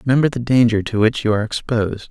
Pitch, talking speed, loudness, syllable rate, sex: 115 Hz, 230 wpm, -18 LUFS, 7.1 syllables/s, male